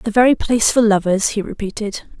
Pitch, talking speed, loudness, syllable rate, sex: 215 Hz, 190 wpm, -17 LUFS, 5.8 syllables/s, female